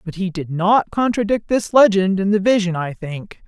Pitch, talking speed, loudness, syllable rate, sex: 195 Hz, 205 wpm, -17 LUFS, 4.8 syllables/s, female